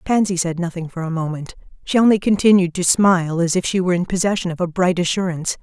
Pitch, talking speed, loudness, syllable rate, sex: 180 Hz, 225 wpm, -18 LUFS, 6.5 syllables/s, female